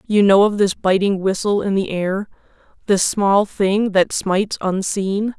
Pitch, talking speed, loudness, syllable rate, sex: 195 Hz, 155 wpm, -18 LUFS, 4.1 syllables/s, female